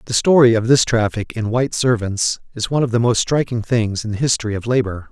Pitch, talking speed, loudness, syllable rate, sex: 115 Hz, 235 wpm, -17 LUFS, 6.0 syllables/s, male